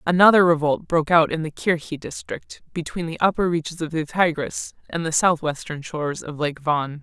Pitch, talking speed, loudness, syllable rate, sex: 160 Hz, 190 wpm, -22 LUFS, 5.2 syllables/s, female